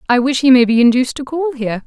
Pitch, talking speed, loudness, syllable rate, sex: 260 Hz, 290 wpm, -14 LUFS, 7.2 syllables/s, female